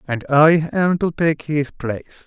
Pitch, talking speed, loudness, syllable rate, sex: 150 Hz, 185 wpm, -18 LUFS, 3.9 syllables/s, male